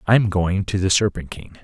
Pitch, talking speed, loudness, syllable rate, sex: 95 Hz, 255 wpm, -19 LUFS, 5.5 syllables/s, male